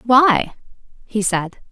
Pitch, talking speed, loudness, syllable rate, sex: 225 Hz, 105 wpm, -18 LUFS, 2.9 syllables/s, female